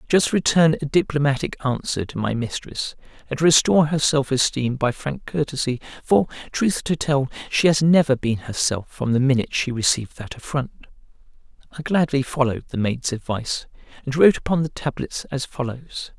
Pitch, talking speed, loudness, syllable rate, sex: 140 Hz, 165 wpm, -21 LUFS, 5.3 syllables/s, male